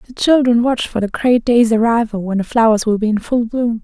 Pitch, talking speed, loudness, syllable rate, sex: 230 Hz, 250 wpm, -15 LUFS, 5.5 syllables/s, female